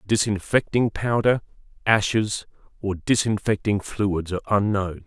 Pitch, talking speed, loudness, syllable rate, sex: 105 Hz, 95 wpm, -23 LUFS, 4.4 syllables/s, male